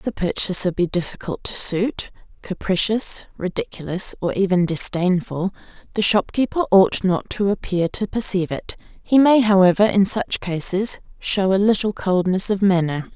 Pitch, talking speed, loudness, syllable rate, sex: 190 Hz, 150 wpm, -19 LUFS, 4.8 syllables/s, female